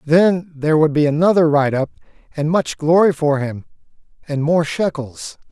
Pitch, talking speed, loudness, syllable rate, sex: 155 Hz, 165 wpm, -17 LUFS, 4.9 syllables/s, male